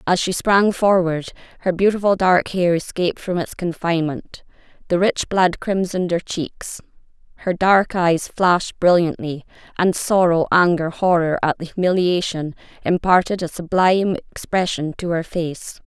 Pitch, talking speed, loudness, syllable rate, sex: 175 Hz, 140 wpm, -19 LUFS, 4.6 syllables/s, female